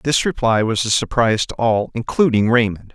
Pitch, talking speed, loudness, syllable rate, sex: 115 Hz, 185 wpm, -17 LUFS, 5.3 syllables/s, male